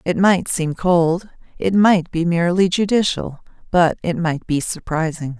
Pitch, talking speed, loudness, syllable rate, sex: 170 Hz, 145 wpm, -18 LUFS, 4.2 syllables/s, female